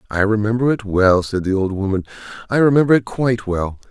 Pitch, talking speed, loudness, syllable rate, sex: 110 Hz, 200 wpm, -17 LUFS, 6.0 syllables/s, male